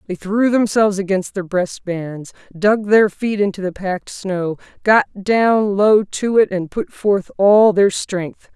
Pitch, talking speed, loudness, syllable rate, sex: 195 Hz, 175 wpm, -17 LUFS, 3.9 syllables/s, female